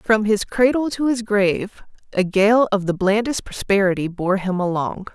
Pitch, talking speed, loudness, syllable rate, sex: 205 Hz, 175 wpm, -19 LUFS, 4.6 syllables/s, female